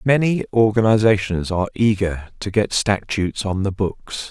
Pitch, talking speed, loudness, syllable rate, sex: 105 Hz, 140 wpm, -19 LUFS, 4.8 syllables/s, male